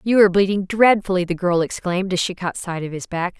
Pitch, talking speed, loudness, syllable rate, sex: 185 Hz, 245 wpm, -19 LUFS, 6.1 syllables/s, female